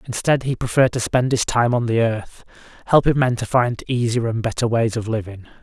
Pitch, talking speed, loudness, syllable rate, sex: 120 Hz, 215 wpm, -19 LUFS, 5.5 syllables/s, male